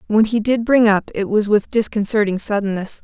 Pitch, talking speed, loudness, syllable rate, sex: 210 Hz, 200 wpm, -17 LUFS, 5.3 syllables/s, female